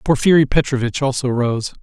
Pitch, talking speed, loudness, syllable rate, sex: 130 Hz, 130 wpm, -17 LUFS, 5.4 syllables/s, male